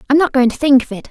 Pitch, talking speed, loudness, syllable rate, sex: 270 Hz, 380 wpm, -13 LUFS, 7.5 syllables/s, female